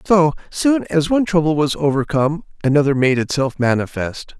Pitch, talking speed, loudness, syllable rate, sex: 150 Hz, 150 wpm, -18 LUFS, 5.3 syllables/s, male